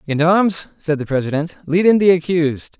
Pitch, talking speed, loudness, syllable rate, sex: 165 Hz, 170 wpm, -17 LUFS, 5.7 syllables/s, male